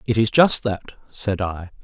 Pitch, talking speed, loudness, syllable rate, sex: 105 Hz, 195 wpm, -20 LUFS, 4.2 syllables/s, male